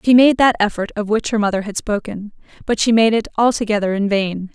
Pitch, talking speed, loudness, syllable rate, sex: 215 Hz, 225 wpm, -17 LUFS, 5.8 syllables/s, female